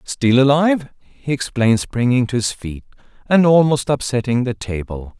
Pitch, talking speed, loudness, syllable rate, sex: 125 Hz, 150 wpm, -17 LUFS, 4.6 syllables/s, male